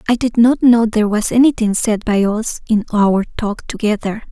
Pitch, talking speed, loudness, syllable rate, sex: 220 Hz, 195 wpm, -15 LUFS, 4.9 syllables/s, female